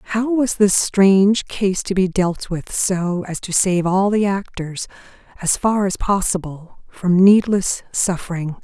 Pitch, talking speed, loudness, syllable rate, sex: 190 Hz, 160 wpm, -18 LUFS, 4.0 syllables/s, female